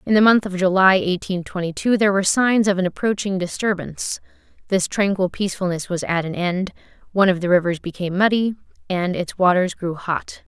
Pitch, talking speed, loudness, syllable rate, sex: 185 Hz, 190 wpm, -20 LUFS, 5.8 syllables/s, female